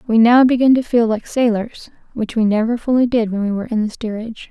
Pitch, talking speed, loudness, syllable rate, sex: 230 Hz, 240 wpm, -16 LUFS, 6.1 syllables/s, female